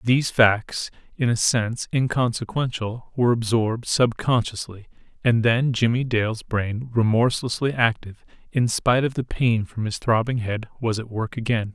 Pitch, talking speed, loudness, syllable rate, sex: 115 Hz, 150 wpm, -22 LUFS, 5.0 syllables/s, male